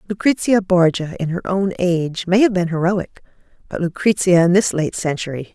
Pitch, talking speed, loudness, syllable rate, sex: 180 Hz, 175 wpm, -18 LUFS, 5.2 syllables/s, female